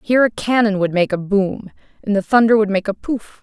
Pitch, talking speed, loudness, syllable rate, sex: 205 Hz, 245 wpm, -17 LUFS, 5.7 syllables/s, female